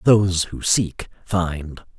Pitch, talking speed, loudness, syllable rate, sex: 90 Hz, 120 wpm, -21 LUFS, 3.2 syllables/s, male